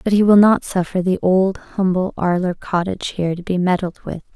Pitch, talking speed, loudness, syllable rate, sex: 185 Hz, 205 wpm, -18 LUFS, 5.4 syllables/s, female